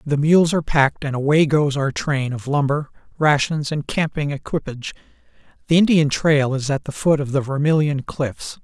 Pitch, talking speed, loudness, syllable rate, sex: 145 Hz, 180 wpm, -19 LUFS, 5.1 syllables/s, male